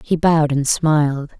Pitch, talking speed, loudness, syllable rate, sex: 150 Hz, 170 wpm, -17 LUFS, 4.9 syllables/s, female